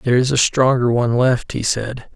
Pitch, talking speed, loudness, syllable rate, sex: 125 Hz, 220 wpm, -17 LUFS, 5.5 syllables/s, male